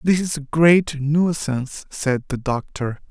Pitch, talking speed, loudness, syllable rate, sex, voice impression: 150 Hz, 155 wpm, -20 LUFS, 3.9 syllables/s, male, masculine, adult-like, thin, relaxed, slightly weak, soft, raspy, calm, friendly, reassuring, kind, modest